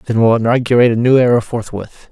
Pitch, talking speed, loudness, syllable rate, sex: 115 Hz, 200 wpm, -13 LUFS, 6.7 syllables/s, male